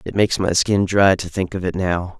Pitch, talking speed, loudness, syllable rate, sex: 95 Hz, 275 wpm, -18 LUFS, 5.3 syllables/s, male